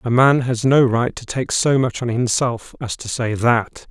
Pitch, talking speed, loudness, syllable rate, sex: 120 Hz, 230 wpm, -18 LUFS, 4.3 syllables/s, male